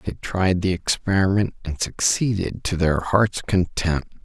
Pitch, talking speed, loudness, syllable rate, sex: 95 Hz, 140 wpm, -22 LUFS, 4.1 syllables/s, male